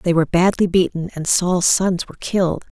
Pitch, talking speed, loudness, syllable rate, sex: 175 Hz, 195 wpm, -18 LUFS, 5.5 syllables/s, female